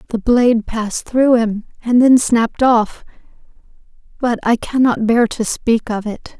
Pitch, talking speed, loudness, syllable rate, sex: 235 Hz, 160 wpm, -15 LUFS, 4.4 syllables/s, female